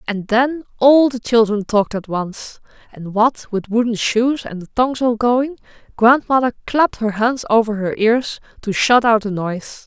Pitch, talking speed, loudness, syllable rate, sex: 230 Hz, 185 wpm, -17 LUFS, 4.6 syllables/s, female